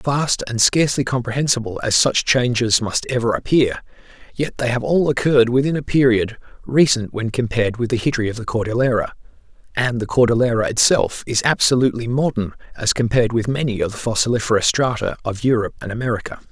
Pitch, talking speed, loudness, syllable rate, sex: 120 Hz, 165 wpm, -18 LUFS, 6.1 syllables/s, male